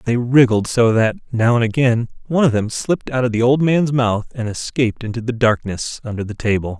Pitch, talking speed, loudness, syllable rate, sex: 120 Hz, 220 wpm, -18 LUFS, 5.6 syllables/s, male